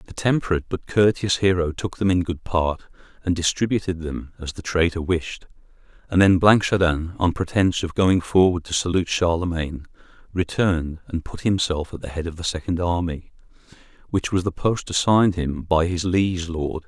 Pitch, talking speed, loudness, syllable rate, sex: 90 Hz, 175 wpm, -22 LUFS, 5.3 syllables/s, male